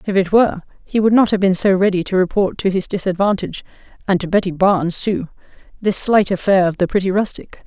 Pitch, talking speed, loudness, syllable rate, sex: 190 Hz, 210 wpm, -17 LUFS, 5.4 syllables/s, female